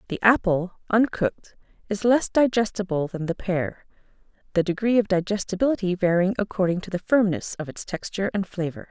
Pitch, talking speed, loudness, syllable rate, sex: 195 Hz, 155 wpm, -24 LUFS, 5.7 syllables/s, female